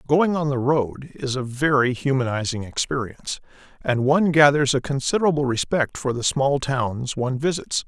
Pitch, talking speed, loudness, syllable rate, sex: 135 Hz, 160 wpm, -22 LUFS, 5.1 syllables/s, male